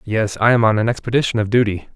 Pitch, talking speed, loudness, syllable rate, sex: 110 Hz, 245 wpm, -17 LUFS, 6.7 syllables/s, male